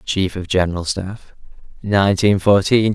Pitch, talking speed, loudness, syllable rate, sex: 100 Hz, 120 wpm, -17 LUFS, 4.6 syllables/s, male